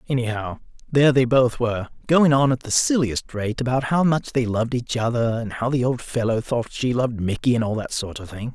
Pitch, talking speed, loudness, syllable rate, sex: 120 Hz, 230 wpm, -21 LUFS, 5.6 syllables/s, male